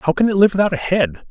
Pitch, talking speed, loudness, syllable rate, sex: 175 Hz, 320 wpm, -16 LUFS, 6.5 syllables/s, male